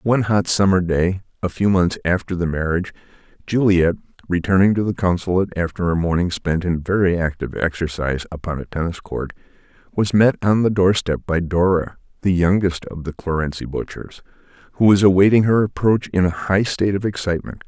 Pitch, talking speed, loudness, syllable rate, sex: 90 Hz, 175 wpm, -19 LUFS, 5.7 syllables/s, male